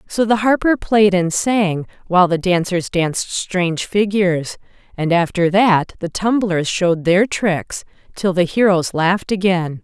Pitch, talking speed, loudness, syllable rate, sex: 185 Hz, 155 wpm, -17 LUFS, 4.4 syllables/s, female